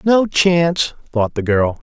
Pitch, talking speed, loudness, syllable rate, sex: 150 Hz, 160 wpm, -16 LUFS, 3.9 syllables/s, male